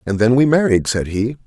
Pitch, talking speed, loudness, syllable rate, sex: 120 Hz, 245 wpm, -16 LUFS, 5.5 syllables/s, male